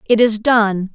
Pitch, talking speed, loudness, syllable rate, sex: 215 Hz, 190 wpm, -15 LUFS, 3.6 syllables/s, female